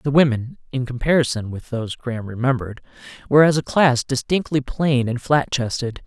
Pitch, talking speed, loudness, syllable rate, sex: 130 Hz, 170 wpm, -20 LUFS, 5.6 syllables/s, male